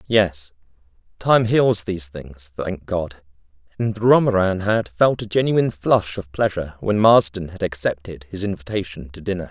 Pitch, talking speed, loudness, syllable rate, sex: 95 Hz, 150 wpm, -20 LUFS, 4.7 syllables/s, male